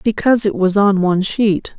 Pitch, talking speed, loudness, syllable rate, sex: 200 Hz, 200 wpm, -15 LUFS, 5.4 syllables/s, female